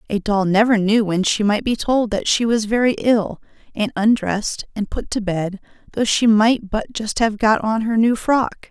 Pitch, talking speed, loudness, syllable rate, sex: 215 Hz, 215 wpm, -18 LUFS, 4.6 syllables/s, female